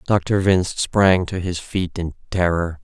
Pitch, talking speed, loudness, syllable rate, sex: 90 Hz, 170 wpm, -20 LUFS, 4.0 syllables/s, male